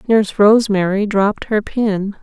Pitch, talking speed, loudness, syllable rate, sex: 205 Hz, 135 wpm, -15 LUFS, 4.9 syllables/s, female